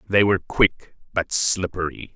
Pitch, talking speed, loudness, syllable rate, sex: 90 Hz, 140 wpm, -21 LUFS, 4.3 syllables/s, male